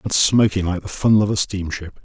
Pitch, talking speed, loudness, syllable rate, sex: 95 Hz, 235 wpm, -18 LUFS, 5.7 syllables/s, male